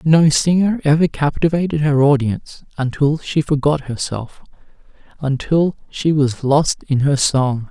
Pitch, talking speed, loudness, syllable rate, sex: 145 Hz, 130 wpm, -17 LUFS, 4.3 syllables/s, male